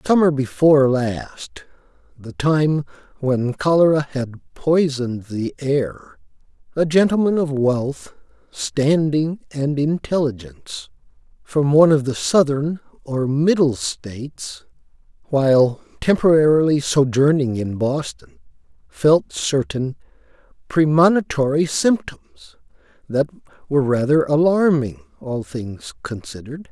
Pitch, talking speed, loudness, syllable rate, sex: 145 Hz, 95 wpm, -19 LUFS, 4.0 syllables/s, male